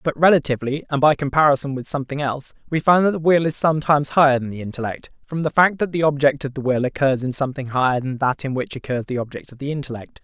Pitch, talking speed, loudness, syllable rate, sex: 140 Hz, 245 wpm, -20 LUFS, 6.9 syllables/s, male